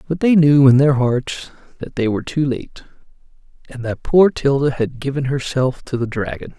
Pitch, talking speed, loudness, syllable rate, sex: 135 Hz, 190 wpm, -17 LUFS, 4.9 syllables/s, male